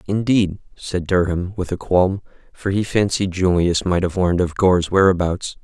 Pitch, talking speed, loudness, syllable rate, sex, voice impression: 90 Hz, 170 wpm, -19 LUFS, 4.8 syllables/s, male, masculine, very adult-like, slightly thick, cool, sincere, calm